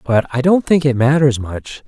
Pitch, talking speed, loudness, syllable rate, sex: 135 Hz, 225 wpm, -15 LUFS, 4.7 syllables/s, male